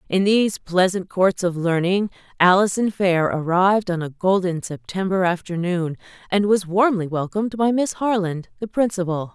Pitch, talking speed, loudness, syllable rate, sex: 185 Hz, 150 wpm, -20 LUFS, 4.9 syllables/s, female